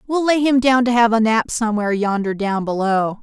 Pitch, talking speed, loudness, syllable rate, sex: 225 Hz, 225 wpm, -17 LUFS, 5.6 syllables/s, female